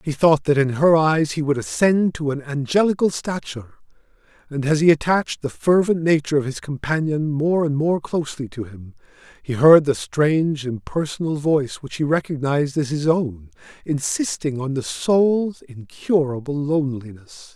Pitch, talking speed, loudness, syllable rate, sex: 145 Hz, 160 wpm, -20 LUFS, 5.0 syllables/s, male